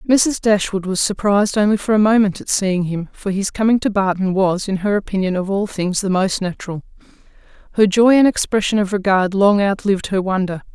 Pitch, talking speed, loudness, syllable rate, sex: 200 Hz, 200 wpm, -17 LUFS, 5.6 syllables/s, female